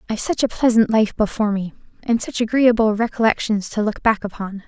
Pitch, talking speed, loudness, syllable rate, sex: 220 Hz, 190 wpm, -19 LUFS, 6.0 syllables/s, female